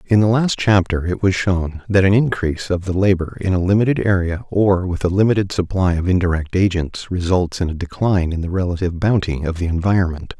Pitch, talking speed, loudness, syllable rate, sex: 90 Hz, 210 wpm, -18 LUFS, 5.9 syllables/s, male